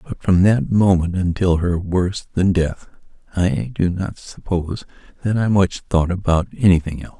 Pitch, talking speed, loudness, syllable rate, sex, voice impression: 95 Hz, 165 wpm, -19 LUFS, 4.7 syllables/s, male, masculine, adult-like, relaxed, weak, dark, muffled, slightly sincere, calm, mature, slightly friendly, reassuring, wild, kind